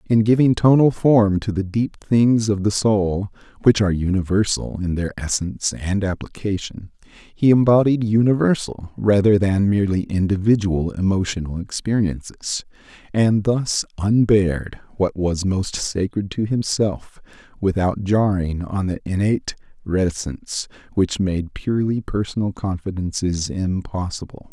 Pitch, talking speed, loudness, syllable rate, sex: 100 Hz, 120 wpm, -20 LUFS, 4.6 syllables/s, male